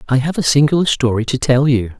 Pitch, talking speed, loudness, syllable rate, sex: 135 Hz, 240 wpm, -15 LUFS, 6.2 syllables/s, male